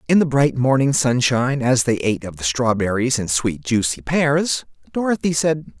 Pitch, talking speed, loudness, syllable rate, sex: 130 Hz, 175 wpm, -19 LUFS, 4.9 syllables/s, male